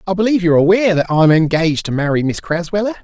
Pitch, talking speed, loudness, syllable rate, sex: 175 Hz, 235 wpm, -15 LUFS, 7.8 syllables/s, male